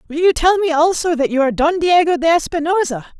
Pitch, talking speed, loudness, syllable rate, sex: 320 Hz, 225 wpm, -15 LUFS, 6.1 syllables/s, female